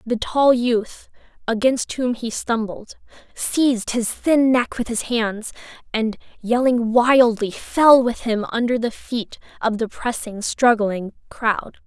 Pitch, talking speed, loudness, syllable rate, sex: 235 Hz, 140 wpm, -20 LUFS, 3.6 syllables/s, female